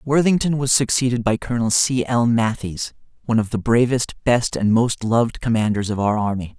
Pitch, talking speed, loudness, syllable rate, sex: 115 Hz, 180 wpm, -19 LUFS, 5.3 syllables/s, male